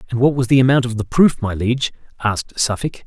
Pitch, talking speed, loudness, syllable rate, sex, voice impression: 120 Hz, 235 wpm, -17 LUFS, 6.4 syllables/s, male, masculine, slightly adult-like, slightly middle-aged, slightly thick, slightly tensed, slightly powerful, slightly dark, hard, slightly muffled, fluent, slightly cool, very intellectual, slightly refreshing, sincere, slightly calm, mature, slightly friendly, slightly reassuring, unique, slightly wild, slightly sweet, strict, intense